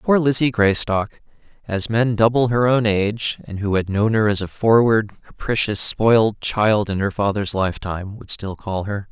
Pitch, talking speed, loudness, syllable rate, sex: 105 Hz, 180 wpm, -19 LUFS, 4.6 syllables/s, male